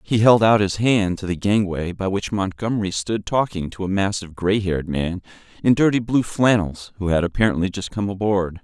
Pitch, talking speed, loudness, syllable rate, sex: 100 Hz, 200 wpm, -20 LUFS, 5.3 syllables/s, male